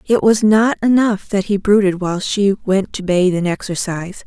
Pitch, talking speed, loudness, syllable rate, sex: 200 Hz, 195 wpm, -16 LUFS, 4.9 syllables/s, female